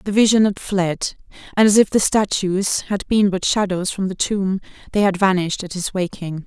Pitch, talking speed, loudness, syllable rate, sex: 195 Hz, 205 wpm, -19 LUFS, 5.0 syllables/s, female